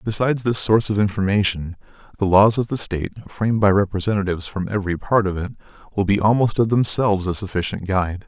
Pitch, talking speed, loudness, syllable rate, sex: 100 Hz, 190 wpm, -20 LUFS, 6.4 syllables/s, male